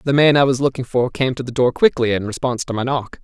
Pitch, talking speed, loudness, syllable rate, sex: 130 Hz, 295 wpm, -18 LUFS, 6.5 syllables/s, male